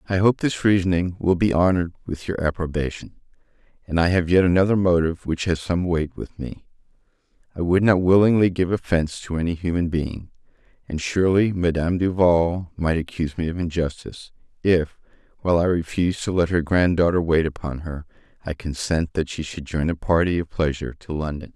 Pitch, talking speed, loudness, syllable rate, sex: 85 Hz, 180 wpm, -22 LUFS, 5.7 syllables/s, male